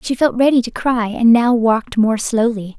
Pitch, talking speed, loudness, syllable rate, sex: 235 Hz, 215 wpm, -15 LUFS, 4.8 syllables/s, female